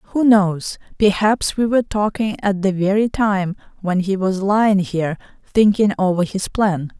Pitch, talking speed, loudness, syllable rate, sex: 200 Hz, 165 wpm, -18 LUFS, 4.5 syllables/s, female